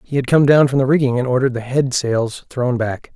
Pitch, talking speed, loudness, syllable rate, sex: 130 Hz, 265 wpm, -17 LUFS, 5.6 syllables/s, male